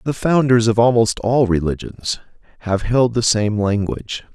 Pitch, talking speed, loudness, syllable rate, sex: 115 Hz, 150 wpm, -17 LUFS, 4.6 syllables/s, male